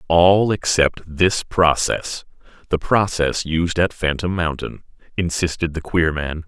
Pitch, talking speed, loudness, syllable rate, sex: 85 Hz, 120 wpm, -19 LUFS, 3.9 syllables/s, male